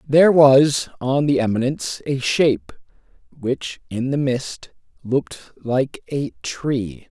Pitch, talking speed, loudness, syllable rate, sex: 130 Hz, 125 wpm, -19 LUFS, 3.9 syllables/s, male